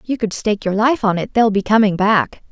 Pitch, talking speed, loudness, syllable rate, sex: 210 Hz, 265 wpm, -16 LUFS, 5.5 syllables/s, female